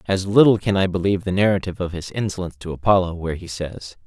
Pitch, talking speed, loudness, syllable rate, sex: 95 Hz, 220 wpm, -20 LUFS, 7.0 syllables/s, male